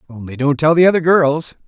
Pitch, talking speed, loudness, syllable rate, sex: 150 Hz, 215 wpm, -14 LUFS, 5.8 syllables/s, male